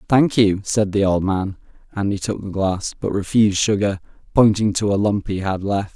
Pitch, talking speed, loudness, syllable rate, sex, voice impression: 100 Hz, 210 wpm, -19 LUFS, 5.0 syllables/s, male, masculine, middle-aged, slightly relaxed, powerful, clear, slightly halting, slightly raspy, calm, slightly mature, friendly, reassuring, wild, slightly lively, kind, slightly modest